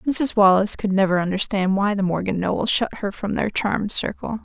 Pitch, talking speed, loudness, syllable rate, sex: 200 Hz, 205 wpm, -20 LUFS, 5.6 syllables/s, female